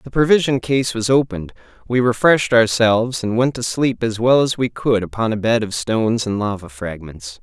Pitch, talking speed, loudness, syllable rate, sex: 115 Hz, 200 wpm, -18 LUFS, 5.2 syllables/s, male